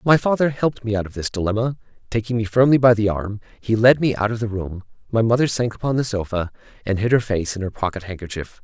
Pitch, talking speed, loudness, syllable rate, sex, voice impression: 110 Hz, 245 wpm, -20 LUFS, 6.2 syllables/s, male, masculine, adult-like, thick, tensed, powerful, slightly clear, fluent, cool, intellectual, slightly mature, friendly, lively, slightly light